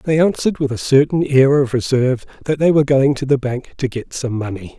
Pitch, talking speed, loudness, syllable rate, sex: 135 Hz, 240 wpm, -17 LUFS, 5.8 syllables/s, male